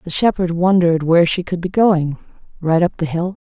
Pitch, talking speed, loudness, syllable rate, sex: 175 Hz, 190 wpm, -17 LUFS, 5.6 syllables/s, female